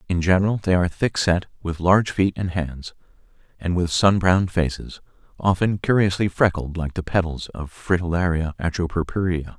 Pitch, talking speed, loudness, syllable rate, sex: 90 Hz, 150 wpm, -22 LUFS, 5.3 syllables/s, male